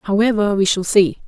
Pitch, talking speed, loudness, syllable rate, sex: 205 Hz, 190 wpm, -16 LUFS, 5.2 syllables/s, female